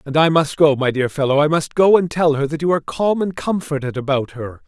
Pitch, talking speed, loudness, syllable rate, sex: 150 Hz, 270 wpm, -17 LUFS, 5.7 syllables/s, male